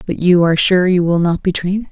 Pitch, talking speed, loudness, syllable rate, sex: 180 Hz, 280 wpm, -14 LUFS, 6.2 syllables/s, female